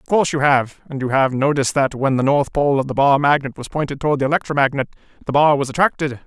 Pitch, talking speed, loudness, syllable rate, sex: 140 Hz, 250 wpm, -18 LUFS, 6.7 syllables/s, male